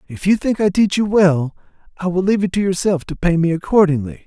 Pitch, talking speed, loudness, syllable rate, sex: 180 Hz, 240 wpm, -17 LUFS, 6.1 syllables/s, male